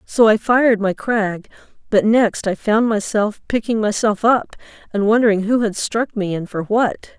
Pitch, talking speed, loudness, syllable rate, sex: 215 Hz, 185 wpm, -17 LUFS, 4.7 syllables/s, female